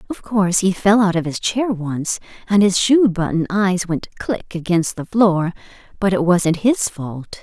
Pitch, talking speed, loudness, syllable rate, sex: 190 Hz, 195 wpm, -18 LUFS, 4.3 syllables/s, female